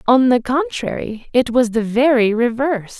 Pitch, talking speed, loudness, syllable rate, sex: 250 Hz, 160 wpm, -17 LUFS, 4.7 syllables/s, female